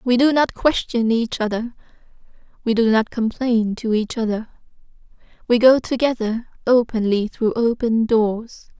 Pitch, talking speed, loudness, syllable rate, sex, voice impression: 230 Hz, 135 wpm, -19 LUFS, 4.4 syllables/s, female, very feminine, young, thin, slightly tensed, slightly powerful, slightly dark, soft, clear, fluent, slightly raspy, very cute, very intellectual, very refreshing, sincere, slightly calm, very friendly, very reassuring, very unique, very elegant, slightly wild, very sweet, lively, kind, slightly intense, modest, very light